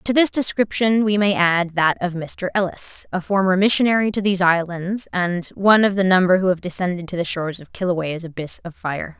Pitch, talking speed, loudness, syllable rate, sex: 185 Hz, 210 wpm, -19 LUFS, 5.4 syllables/s, female